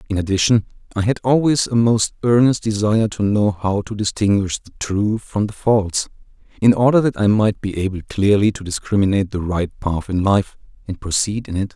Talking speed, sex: 205 wpm, male